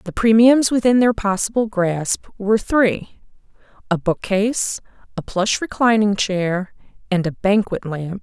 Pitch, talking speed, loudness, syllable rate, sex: 205 Hz, 130 wpm, -18 LUFS, 4.2 syllables/s, female